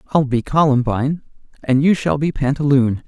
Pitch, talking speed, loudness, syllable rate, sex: 135 Hz, 155 wpm, -17 LUFS, 5.1 syllables/s, male